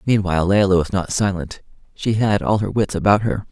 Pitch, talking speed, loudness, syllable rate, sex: 100 Hz, 205 wpm, -19 LUFS, 5.6 syllables/s, male